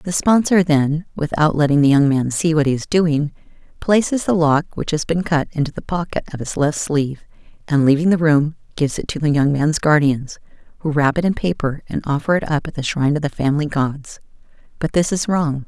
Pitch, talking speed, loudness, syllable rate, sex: 155 Hz, 220 wpm, -18 LUFS, 5.5 syllables/s, female